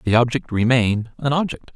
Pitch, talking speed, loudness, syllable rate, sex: 125 Hz, 170 wpm, -20 LUFS, 5.5 syllables/s, male